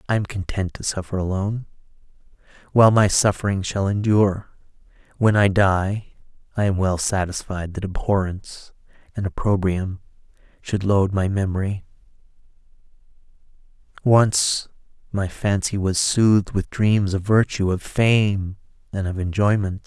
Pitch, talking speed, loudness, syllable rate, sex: 100 Hz, 120 wpm, -21 LUFS, 4.6 syllables/s, male